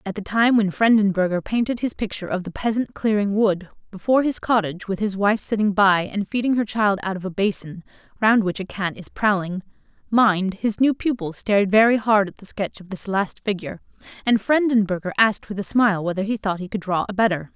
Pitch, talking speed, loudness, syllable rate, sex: 205 Hz, 215 wpm, -21 LUFS, 5.7 syllables/s, female